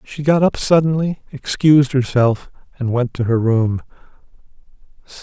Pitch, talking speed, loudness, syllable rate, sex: 135 Hz, 125 wpm, -17 LUFS, 4.7 syllables/s, male